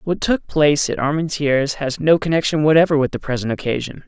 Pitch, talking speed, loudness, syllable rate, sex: 150 Hz, 190 wpm, -18 LUFS, 6.1 syllables/s, male